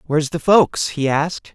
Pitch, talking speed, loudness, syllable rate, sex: 155 Hz, 195 wpm, -18 LUFS, 5.0 syllables/s, male